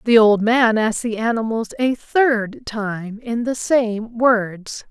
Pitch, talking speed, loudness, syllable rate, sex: 225 Hz, 160 wpm, -19 LUFS, 3.5 syllables/s, female